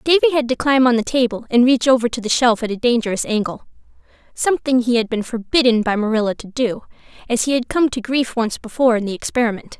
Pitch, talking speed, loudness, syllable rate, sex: 240 Hz, 225 wpm, -18 LUFS, 6.4 syllables/s, female